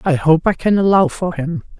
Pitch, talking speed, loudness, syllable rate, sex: 180 Hz, 235 wpm, -16 LUFS, 5.1 syllables/s, female